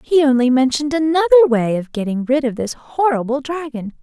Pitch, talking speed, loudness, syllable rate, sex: 255 Hz, 180 wpm, -17 LUFS, 5.7 syllables/s, female